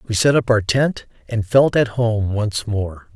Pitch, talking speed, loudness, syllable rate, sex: 110 Hz, 210 wpm, -18 LUFS, 4.0 syllables/s, male